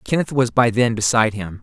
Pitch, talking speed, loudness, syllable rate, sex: 115 Hz, 220 wpm, -18 LUFS, 5.9 syllables/s, male